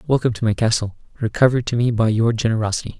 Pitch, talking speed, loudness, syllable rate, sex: 115 Hz, 200 wpm, -19 LUFS, 7.7 syllables/s, male